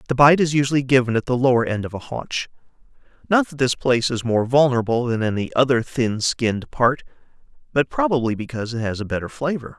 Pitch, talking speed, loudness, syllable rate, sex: 125 Hz, 200 wpm, -20 LUFS, 6.2 syllables/s, male